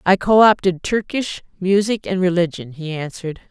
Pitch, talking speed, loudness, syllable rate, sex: 185 Hz, 155 wpm, -18 LUFS, 5.1 syllables/s, female